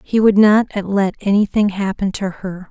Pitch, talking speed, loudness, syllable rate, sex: 200 Hz, 175 wpm, -16 LUFS, 4.5 syllables/s, female